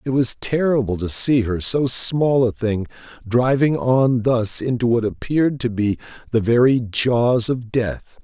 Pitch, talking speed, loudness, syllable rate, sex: 120 Hz, 170 wpm, -18 LUFS, 4.1 syllables/s, male